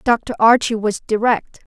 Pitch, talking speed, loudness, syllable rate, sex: 225 Hz, 135 wpm, -17 LUFS, 4.2 syllables/s, female